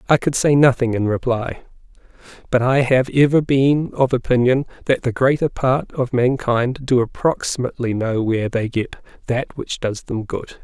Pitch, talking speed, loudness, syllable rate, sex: 125 Hz, 170 wpm, -19 LUFS, 4.9 syllables/s, male